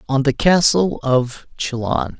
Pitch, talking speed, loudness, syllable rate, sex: 135 Hz, 135 wpm, -17 LUFS, 3.6 syllables/s, male